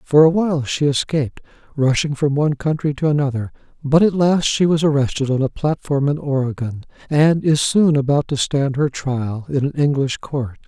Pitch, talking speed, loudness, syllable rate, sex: 145 Hz, 190 wpm, -18 LUFS, 5.1 syllables/s, male